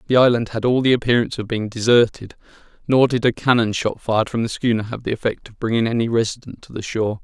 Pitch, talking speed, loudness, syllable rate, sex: 115 Hz, 230 wpm, -19 LUFS, 6.6 syllables/s, male